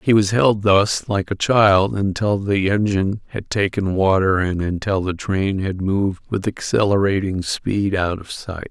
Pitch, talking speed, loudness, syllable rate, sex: 100 Hz, 170 wpm, -19 LUFS, 4.3 syllables/s, male